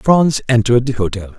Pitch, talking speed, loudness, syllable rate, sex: 120 Hz, 175 wpm, -15 LUFS, 5.5 syllables/s, male